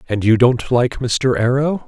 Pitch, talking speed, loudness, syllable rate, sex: 125 Hz, 190 wpm, -16 LUFS, 4.1 syllables/s, male